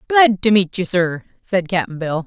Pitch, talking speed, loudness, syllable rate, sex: 190 Hz, 210 wpm, -17 LUFS, 4.1 syllables/s, female